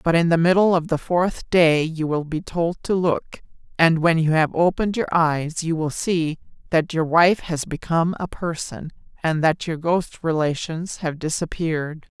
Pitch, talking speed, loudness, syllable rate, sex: 165 Hz, 185 wpm, -21 LUFS, 4.6 syllables/s, female